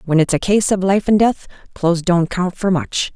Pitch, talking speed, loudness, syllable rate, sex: 180 Hz, 245 wpm, -17 LUFS, 4.7 syllables/s, female